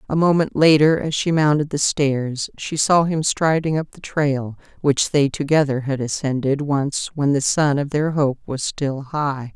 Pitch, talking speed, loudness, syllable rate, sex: 145 Hz, 190 wpm, -19 LUFS, 4.3 syllables/s, female